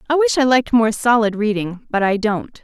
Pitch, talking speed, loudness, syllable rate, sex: 230 Hz, 225 wpm, -17 LUFS, 5.4 syllables/s, female